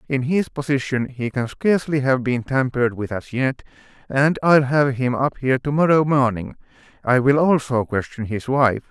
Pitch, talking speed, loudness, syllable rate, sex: 130 Hz, 180 wpm, -20 LUFS, 4.9 syllables/s, male